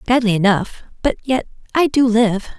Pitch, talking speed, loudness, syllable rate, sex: 230 Hz, 160 wpm, -17 LUFS, 4.8 syllables/s, female